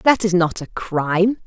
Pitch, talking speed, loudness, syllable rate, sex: 185 Hz, 205 wpm, -19 LUFS, 4.3 syllables/s, female